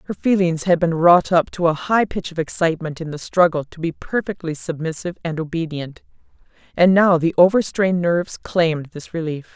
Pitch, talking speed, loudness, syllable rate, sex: 170 Hz, 180 wpm, -19 LUFS, 5.5 syllables/s, female